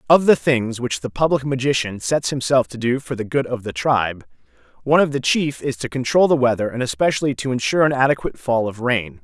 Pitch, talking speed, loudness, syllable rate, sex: 125 Hz, 225 wpm, -19 LUFS, 6.0 syllables/s, male